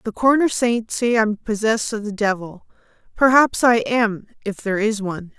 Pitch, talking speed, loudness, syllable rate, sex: 220 Hz, 165 wpm, -19 LUFS, 5.0 syllables/s, female